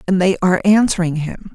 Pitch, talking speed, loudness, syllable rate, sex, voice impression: 185 Hz, 195 wpm, -16 LUFS, 5.9 syllables/s, female, feminine, slightly gender-neutral, very adult-like, middle-aged, slightly thin, slightly relaxed, slightly powerful, slightly dark, soft, clear, fluent, slightly raspy, slightly cute, cool, intellectual, refreshing, very sincere, very calm, friendly, very reassuring, unique, elegant, slightly wild, sweet, slightly lively, kind, slightly sharp, modest, slightly light